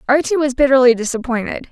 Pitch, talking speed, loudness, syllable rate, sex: 260 Hz, 140 wpm, -15 LUFS, 6.5 syllables/s, female